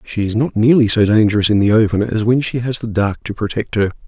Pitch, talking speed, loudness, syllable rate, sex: 110 Hz, 265 wpm, -15 LUFS, 6.0 syllables/s, male